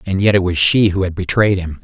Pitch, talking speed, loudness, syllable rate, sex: 95 Hz, 295 wpm, -15 LUFS, 5.8 syllables/s, male